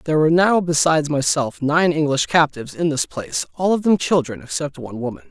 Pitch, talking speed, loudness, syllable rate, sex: 155 Hz, 205 wpm, -19 LUFS, 4.6 syllables/s, male